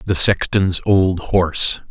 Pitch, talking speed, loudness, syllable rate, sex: 95 Hz, 125 wpm, -16 LUFS, 3.6 syllables/s, male